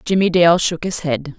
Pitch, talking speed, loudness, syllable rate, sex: 170 Hz, 215 wpm, -16 LUFS, 4.7 syllables/s, female